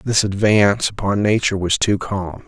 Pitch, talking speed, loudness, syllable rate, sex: 100 Hz, 170 wpm, -18 LUFS, 5.1 syllables/s, male